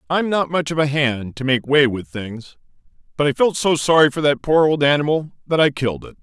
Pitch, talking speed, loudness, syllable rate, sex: 145 Hz, 240 wpm, -18 LUFS, 5.5 syllables/s, male